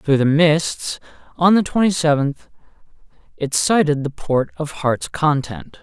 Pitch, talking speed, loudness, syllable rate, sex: 145 Hz, 145 wpm, -18 LUFS, 4.0 syllables/s, male